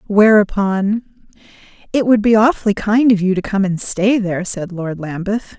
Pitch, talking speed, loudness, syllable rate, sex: 205 Hz, 160 wpm, -16 LUFS, 4.9 syllables/s, female